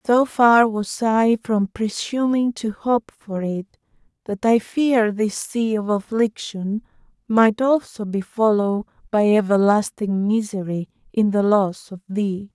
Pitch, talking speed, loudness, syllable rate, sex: 215 Hz, 140 wpm, -20 LUFS, 3.9 syllables/s, female